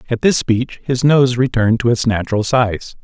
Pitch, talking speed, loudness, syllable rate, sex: 120 Hz, 195 wpm, -15 LUFS, 5.1 syllables/s, male